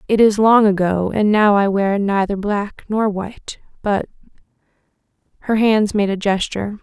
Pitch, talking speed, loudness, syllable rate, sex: 205 Hz, 160 wpm, -17 LUFS, 4.7 syllables/s, female